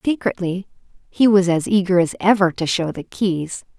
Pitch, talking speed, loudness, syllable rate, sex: 185 Hz, 175 wpm, -18 LUFS, 4.9 syllables/s, female